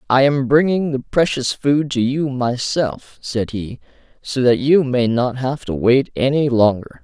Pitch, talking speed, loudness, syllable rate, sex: 130 Hz, 180 wpm, -17 LUFS, 4.1 syllables/s, male